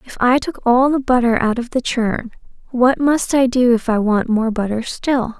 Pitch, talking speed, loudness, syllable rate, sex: 245 Hz, 225 wpm, -17 LUFS, 4.5 syllables/s, female